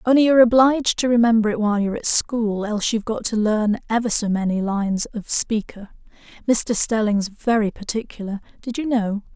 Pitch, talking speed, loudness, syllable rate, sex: 220 Hz, 175 wpm, -20 LUFS, 5.7 syllables/s, female